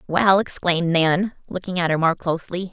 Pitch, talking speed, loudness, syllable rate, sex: 175 Hz, 175 wpm, -20 LUFS, 5.4 syllables/s, female